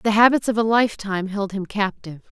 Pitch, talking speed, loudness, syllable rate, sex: 205 Hz, 200 wpm, -20 LUFS, 6.5 syllables/s, female